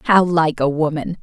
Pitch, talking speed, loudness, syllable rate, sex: 165 Hz, 195 wpm, -17 LUFS, 4.3 syllables/s, female